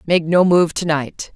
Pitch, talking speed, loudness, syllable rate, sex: 165 Hz, 220 wpm, -16 LUFS, 4.1 syllables/s, female